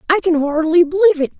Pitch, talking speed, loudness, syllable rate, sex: 330 Hz, 215 wpm, -14 LUFS, 7.2 syllables/s, female